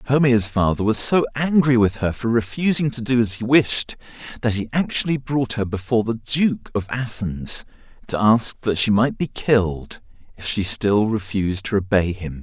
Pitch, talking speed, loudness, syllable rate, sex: 110 Hz, 185 wpm, -20 LUFS, 4.8 syllables/s, male